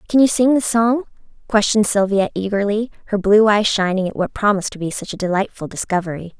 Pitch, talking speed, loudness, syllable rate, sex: 205 Hz, 195 wpm, -18 LUFS, 6.2 syllables/s, female